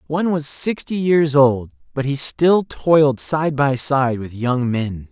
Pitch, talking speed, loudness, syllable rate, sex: 140 Hz, 175 wpm, -18 LUFS, 3.8 syllables/s, male